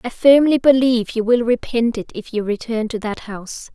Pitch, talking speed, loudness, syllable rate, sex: 230 Hz, 210 wpm, -17 LUFS, 5.2 syllables/s, female